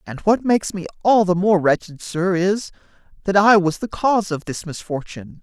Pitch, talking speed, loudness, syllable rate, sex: 185 Hz, 200 wpm, -19 LUFS, 5.2 syllables/s, male